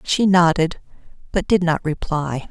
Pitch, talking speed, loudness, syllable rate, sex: 165 Hz, 145 wpm, -19 LUFS, 4.2 syllables/s, female